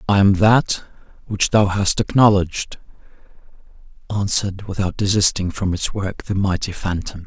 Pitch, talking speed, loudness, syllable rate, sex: 95 Hz, 130 wpm, -18 LUFS, 4.8 syllables/s, male